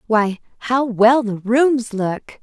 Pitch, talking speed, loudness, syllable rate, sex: 230 Hz, 150 wpm, -17 LUFS, 3.0 syllables/s, female